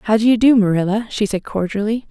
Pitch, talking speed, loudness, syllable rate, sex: 210 Hz, 230 wpm, -17 LUFS, 6.0 syllables/s, female